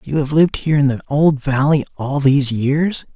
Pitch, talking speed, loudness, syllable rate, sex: 140 Hz, 210 wpm, -16 LUFS, 5.4 syllables/s, male